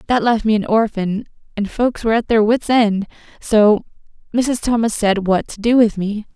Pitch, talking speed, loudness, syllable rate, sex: 220 Hz, 200 wpm, -17 LUFS, 4.9 syllables/s, female